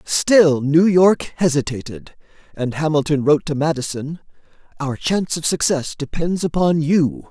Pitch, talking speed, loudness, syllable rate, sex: 150 Hz, 130 wpm, -18 LUFS, 4.5 syllables/s, male